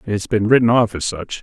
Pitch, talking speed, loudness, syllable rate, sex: 105 Hz, 250 wpm, -17 LUFS, 5.4 syllables/s, male